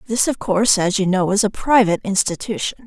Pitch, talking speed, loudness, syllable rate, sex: 205 Hz, 210 wpm, -18 LUFS, 6.0 syllables/s, female